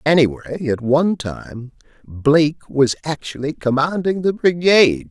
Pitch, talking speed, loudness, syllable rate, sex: 145 Hz, 120 wpm, -18 LUFS, 4.7 syllables/s, male